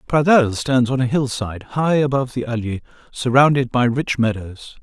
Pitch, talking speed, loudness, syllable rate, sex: 125 Hz, 160 wpm, -18 LUFS, 5.3 syllables/s, male